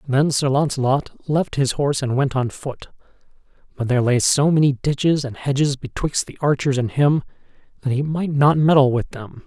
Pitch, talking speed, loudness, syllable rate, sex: 140 Hz, 190 wpm, -19 LUFS, 5.2 syllables/s, male